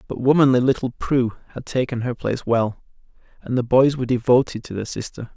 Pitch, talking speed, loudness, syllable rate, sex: 125 Hz, 190 wpm, -20 LUFS, 5.9 syllables/s, male